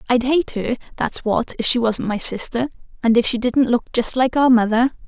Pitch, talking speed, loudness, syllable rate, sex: 240 Hz, 225 wpm, -19 LUFS, 5.1 syllables/s, female